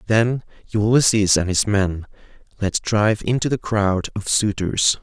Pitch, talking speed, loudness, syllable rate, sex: 105 Hz, 145 wpm, -19 LUFS, 4.3 syllables/s, male